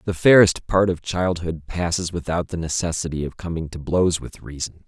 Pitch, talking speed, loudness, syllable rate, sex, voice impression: 85 Hz, 185 wpm, -21 LUFS, 5.1 syllables/s, male, very masculine, very adult-like, middle-aged, very thick, slightly relaxed, very powerful, slightly dark, slightly soft, muffled, fluent, very cool, very intellectual, slightly refreshing, very sincere, very calm, very mature, friendly, very reassuring, very unique, elegant, wild, sweet, slightly lively, very kind, slightly modest